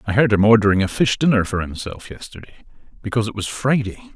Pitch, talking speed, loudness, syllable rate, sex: 110 Hz, 190 wpm, -18 LUFS, 7.0 syllables/s, male